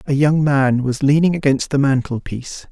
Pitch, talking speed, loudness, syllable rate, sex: 140 Hz, 200 wpm, -17 LUFS, 5.0 syllables/s, male